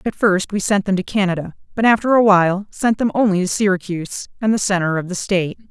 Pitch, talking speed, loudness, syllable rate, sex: 195 Hz, 230 wpm, -18 LUFS, 6.3 syllables/s, female